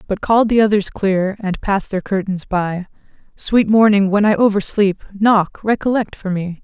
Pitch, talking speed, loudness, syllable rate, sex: 200 Hz, 180 wpm, -16 LUFS, 4.8 syllables/s, female